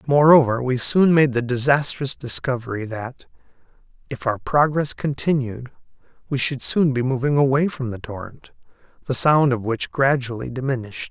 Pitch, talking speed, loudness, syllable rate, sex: 130 Hz, 145 wpm, -20 LUFS, 4.9 syllables/s, male